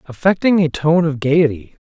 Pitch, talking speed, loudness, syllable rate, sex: 155 Hz, 160 wpm, -16 LUFS, 4.9 syllables/s, male